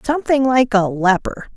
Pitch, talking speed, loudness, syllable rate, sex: 235 Hz, 155 wpm, -16 LUFS, 5.3 syllables/s, female